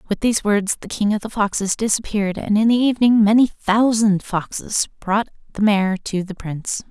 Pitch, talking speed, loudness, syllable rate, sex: 210 Hz, 190 wpm, -19 LUFS, 5.3 syllables/s, female